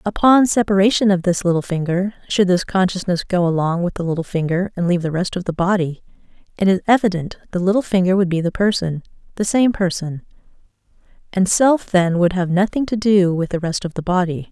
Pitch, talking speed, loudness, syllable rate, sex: 185 Hz, 205 wpm, -18 LUFS, 5.8 syllables/s, female